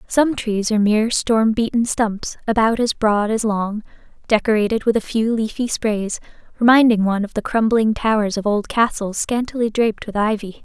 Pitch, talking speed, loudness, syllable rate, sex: 220 Hz, 175 wpm, -18 LUFS, 5.1 syllables/s, female